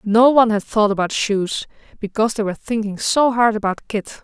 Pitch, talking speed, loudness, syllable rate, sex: 215 Hz, 200 wpm, -18 LUFS, 5.6 syllables/s, female